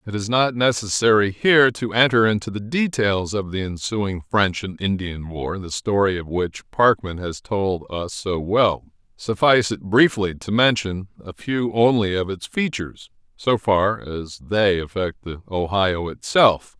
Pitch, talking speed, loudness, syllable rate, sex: 100 Hz, 165 wpm, -20 LUFS, 4.3 syllables/s, male